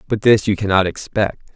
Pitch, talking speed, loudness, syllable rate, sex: 105 Hz, 195 wpm, -17 LUFS, 5.6 syllables/s, male